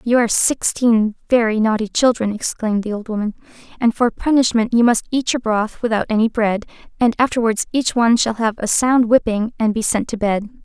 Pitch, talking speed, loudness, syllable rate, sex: 225 Hz, 195 wpm, -17 LUFS, 5.5 syllables/s, female